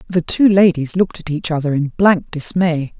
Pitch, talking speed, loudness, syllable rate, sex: 170 Hz, 200 wpm, -16 LUFS, 5.0 syllables/s, female